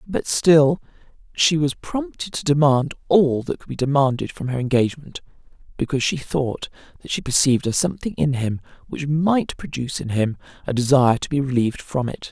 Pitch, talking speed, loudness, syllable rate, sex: 145 Hz, 175 wpm, -21 LUFS, 5.5 syllables/s, female